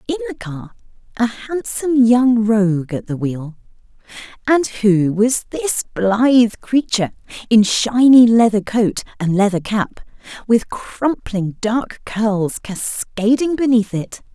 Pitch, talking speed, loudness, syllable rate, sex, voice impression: 225 Hz, 125 wpm, -17 LUFS, 3.8 syllables/s, female, very feminine, very adult-like, slightly unique, slightly elegant, slightly intense